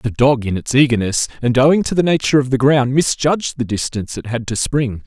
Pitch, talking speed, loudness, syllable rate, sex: 130 Hz, 235 wpm, -16 LUFS, 5.9 syllables/s, male